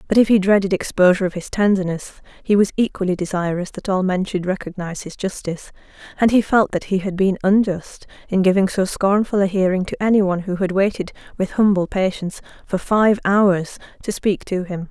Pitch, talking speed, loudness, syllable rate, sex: 190 Hz, 195 wpm, -19 LUFS, 5.8 syllables/s, female